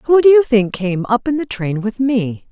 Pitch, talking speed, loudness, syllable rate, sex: 235 Hz, 260 wpm, -15 LUFS, 4.5 syllables/s, female